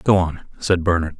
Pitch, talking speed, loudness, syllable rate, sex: 85 Hz, 200 wpm, -20 LUFS, 4.9 syllables/s, male